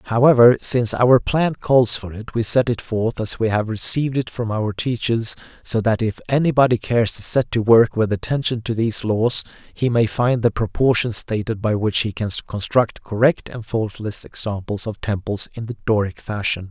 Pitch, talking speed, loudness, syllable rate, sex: 115 Hz, 195 wpm, -19 LUFS, 4.9 syllables/s, male